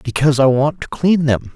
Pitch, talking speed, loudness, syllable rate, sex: 140 Hz, 230 wpm, -15 LUFS, 5.5 syllables/s, male